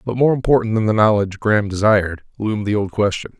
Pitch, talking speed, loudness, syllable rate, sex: 105 Hz, 210 wpm, -18 LUFS, 6.7 syllables/s, male